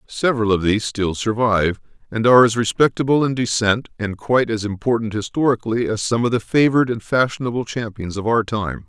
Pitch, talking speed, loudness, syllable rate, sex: 115 Hz, 180 wpm, -19 LUFS, 6.0 syllables/s, male